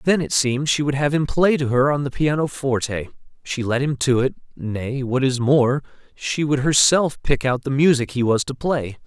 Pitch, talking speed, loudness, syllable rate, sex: 135 Hz, 220 wpm, -20 LUFS, 4.9 syllables/s, male